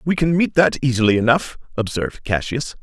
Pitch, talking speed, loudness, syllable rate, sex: 130 Hz, 170 wpm, -19 LUFS, 5.6 syllables/s, male